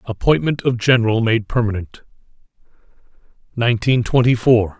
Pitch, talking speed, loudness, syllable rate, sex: 115 Hz, 100 wpm, -17 LUFS, 5.4 syllables/s, male